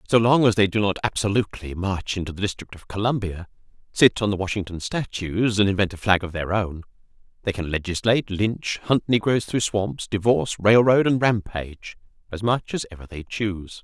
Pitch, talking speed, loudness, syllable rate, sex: 100 Hz, 185 wpm, -22 LUFS, 5.5 syllables/s, male